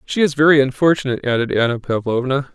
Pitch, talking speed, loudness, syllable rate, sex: 135 Hz, 165 wpm, -17 LUFS, 6.5 syllables/s, male